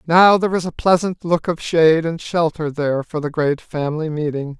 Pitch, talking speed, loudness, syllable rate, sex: 160 Hz, 210 wpm, -18 LUFS, 5.4 syllables/s, male